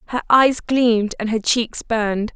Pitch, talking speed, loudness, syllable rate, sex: 230 Hz, 180 wpm, -18 LUFS, 4.6 syllables/s, female